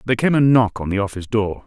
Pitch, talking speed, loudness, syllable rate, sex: 110 Hz, 290 wpm, -18 LUFS, 7.3 syllables/s, male